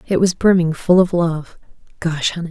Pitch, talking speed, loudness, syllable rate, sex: 170 Hz, 170 wpm, -17 LUFS, 5.1 syllables/s, female